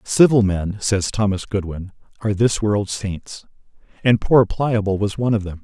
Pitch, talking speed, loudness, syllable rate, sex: 105 Hz, 170 wpm, -19 LUFS, 4.7 syllables/s, male